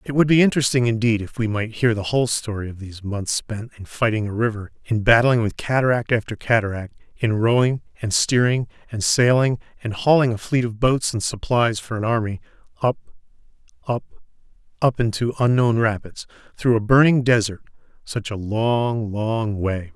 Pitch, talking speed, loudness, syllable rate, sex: 115 Hz, 175 wpm, -20 LUFS, 5.3 syllables/s, male